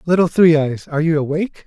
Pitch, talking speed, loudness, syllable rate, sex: 160 Hz, 215 wpm, -16 LUFS, 6.5 syllables/s, male